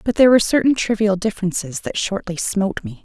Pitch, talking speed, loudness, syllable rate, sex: 200 Hz, 195 wpm, -18 LUFS, 6.5 syllables/s, female